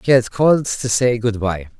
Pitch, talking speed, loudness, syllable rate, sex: 120 Hz, 235 wpm, -17 LUFS, 5.0 syllables/s, male